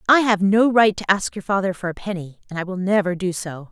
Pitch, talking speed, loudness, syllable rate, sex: 190 Hz, 275 wpm, -20 LUFS, 5.8 syllables/s, female